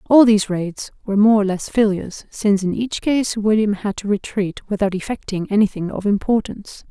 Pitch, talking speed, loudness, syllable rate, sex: 205 Hz, 180 wpm, -19 LUFS, 5.6 syllables/s, female